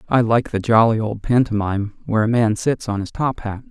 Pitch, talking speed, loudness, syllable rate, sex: 110 Hz, 225 wpm, -19 LUFS, 5.6 syllables/s, male